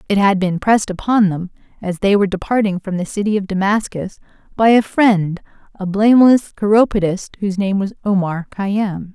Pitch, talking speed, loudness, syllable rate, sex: 200 Hz, 170 wpm, -16 LUFS, 5.2 syllables/s, female